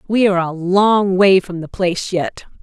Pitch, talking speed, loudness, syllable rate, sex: 185 Hz, 205 wpm, -16 LUFS, 4.7 syllables/s, female